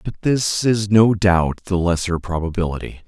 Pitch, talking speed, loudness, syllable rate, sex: 95 Hz, 155 wpm, -18 LUFS, 4.7 syllables/s, male